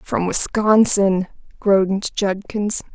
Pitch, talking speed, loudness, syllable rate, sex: 200 Hz, 80 wpm, -18 LUFS, 3.3 syllables/s, female